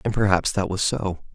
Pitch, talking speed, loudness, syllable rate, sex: 100 Hz, 225 wpm, -23 LUFS, 5.1 syllables/s, male